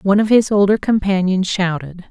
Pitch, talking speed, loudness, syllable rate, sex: 195 Hz, 170 wpm, -16 LUFS, 5.5 syllables/s, female